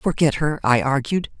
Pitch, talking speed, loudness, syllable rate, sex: 150 Hz, 170 wpm, -20 LUFS, 4.7 syllables/s, female